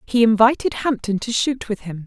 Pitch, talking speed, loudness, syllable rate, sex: 225 Hz, 205 wpm, -19 LUFS, 5.1 syllables/s, female